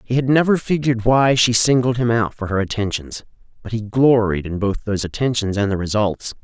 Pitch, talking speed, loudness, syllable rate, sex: 115 Hz, 205 wpm, -18 LUFS, 5.6 syllables/s, male